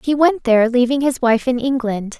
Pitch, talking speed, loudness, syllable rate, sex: 250 Hz, 220 wpm, -16 LUFS, 5.3 syllables/s, female